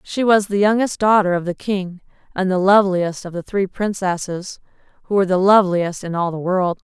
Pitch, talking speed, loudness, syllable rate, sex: 190 Hz, 200 wpm, -18 LUFS, 5.4 syllables/s, female